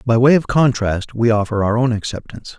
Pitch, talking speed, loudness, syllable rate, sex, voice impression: 120 Hz, 210 wpm, -16 LUFS, 5.7 syllables/s, male, masculine, adult-like, tensed, powerful, bright, slightly soft, clear, cool, intellectual, calm, friendly, reassuring, wild, lively